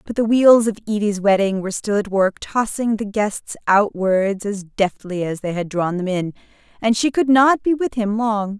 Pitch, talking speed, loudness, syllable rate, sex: 210 Hz, 210 wpm, -19 LUFS, 4.6 syllables/s, female